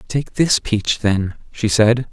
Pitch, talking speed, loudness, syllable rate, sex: 115 Hz, 170 wpm, -18 LUFS, 3.3 syllables/s, male